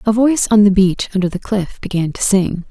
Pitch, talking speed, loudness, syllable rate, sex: 195 Hz, 245 wpm, -15 LUFS, 5.7 syllables/s, female